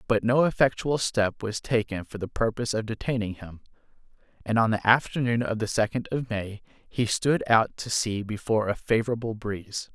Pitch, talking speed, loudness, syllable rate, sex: 110 Hz, 180 wpm, -26 LUFS, 5.2 syllables/s, male